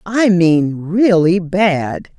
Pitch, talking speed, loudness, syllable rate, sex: 180 Hz, 110 wpm, -14 LUFS, 2.5 syllables/s, female